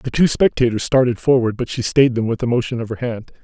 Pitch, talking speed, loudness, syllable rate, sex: 120 Hz, 260 wpm, -18 LUFS, 6.0 syllables/s, male